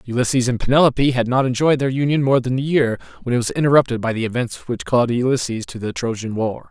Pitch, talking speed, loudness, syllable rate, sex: 125 Hz, 235 wpm, -19 LUFS, 6.5 syllables/s, male